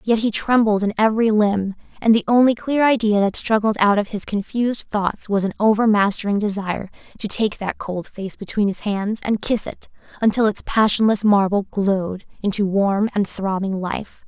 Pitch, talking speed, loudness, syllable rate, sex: 210 Hz, 180 wpm, -19 LUFS, 5.0 syllables/s, female